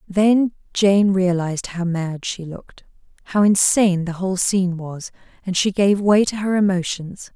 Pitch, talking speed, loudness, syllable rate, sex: 190 Hz, 165 wpm, -19 LUFS, 4.7 syllables/s, female